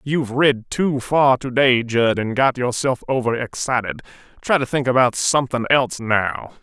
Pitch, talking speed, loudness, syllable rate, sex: 125 Hz, 170 wpm, -19 LUFS, 4.8 syllables/s, male